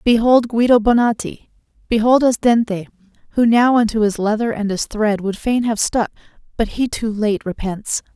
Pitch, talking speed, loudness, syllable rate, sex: 225 Hz, 160 wpm, -17 LUFS, 4.9 syllables/s, female